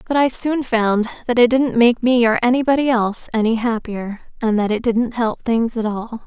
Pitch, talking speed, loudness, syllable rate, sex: 235 Hz, 190 wpm, -18 LUFS, 4.9 syllables/s, female